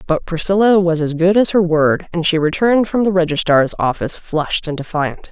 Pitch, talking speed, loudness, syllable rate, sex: 170 Hz, 205 wpm, -16 LUFS, 5.5 syllables/s, female